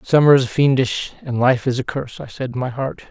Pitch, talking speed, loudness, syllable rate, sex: 125 Hz, 250 wpm, -18 LUFS, 5.8 syllables/s, male